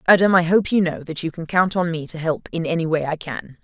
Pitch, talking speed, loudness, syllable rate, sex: 170 Hz, 295 wpm, -20 LUFS, 5.9 syllables/s, female